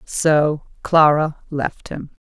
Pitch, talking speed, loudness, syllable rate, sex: 150 Hz, 105 wpm, -18 LUFS, 2.7 syllables/s, female